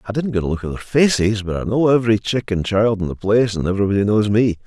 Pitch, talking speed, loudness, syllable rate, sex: 105 Hz, 285 wpm, -18 LUFS, 6.7 syllables/s, male